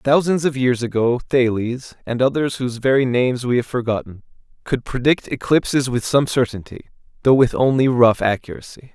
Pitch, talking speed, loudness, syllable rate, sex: 125 Hz, 160 wpm, -18 LUFS, 5.3 syllables/s, male